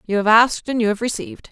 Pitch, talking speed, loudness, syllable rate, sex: 225 Hz, 275 wpm, -17 LUFS, 7.1 syllables/s, female